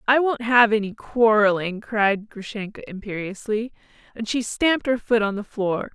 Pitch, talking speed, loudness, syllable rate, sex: 220 Hz, 160 wpm, -22 LUFS, 4.7 syllables/s, female